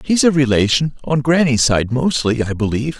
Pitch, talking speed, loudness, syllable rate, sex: 135 Hz, 160 wpm, -16 LUFS, 5.3 syllables/s, male